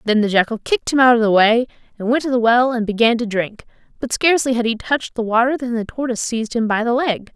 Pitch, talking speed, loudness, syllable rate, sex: 235 Hz, 270 wpm, -17 LUFS, 6.5 syllables/s, female